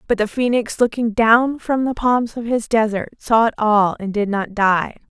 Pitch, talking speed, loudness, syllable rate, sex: 225 Hz, 210 wpm, -18 LUFS, 4.5 syllables/s, female